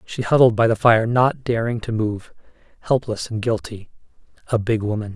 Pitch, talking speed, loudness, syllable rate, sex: 115 Hz, 175 wpm, -20 LUFS, 5.1 syllables/s, male